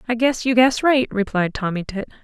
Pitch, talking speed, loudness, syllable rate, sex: 230 Hz, 215 wpm, -19 LUFS, 5.1 syllables/s, female